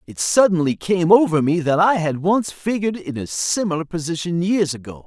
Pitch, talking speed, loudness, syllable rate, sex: 170 Hz, 190 wpm, -19 LUFS, 5.3 syllables/s, male